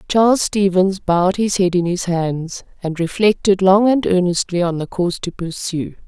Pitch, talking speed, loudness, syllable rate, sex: 185 Hz, 180 wpm, -17 LUFS, 4.8 syllables/s, female